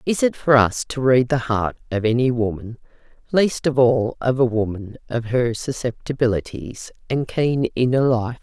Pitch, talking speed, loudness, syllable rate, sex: 120 Hz, 170 wpm, -20 LUFS, 4.5 syllables/s, female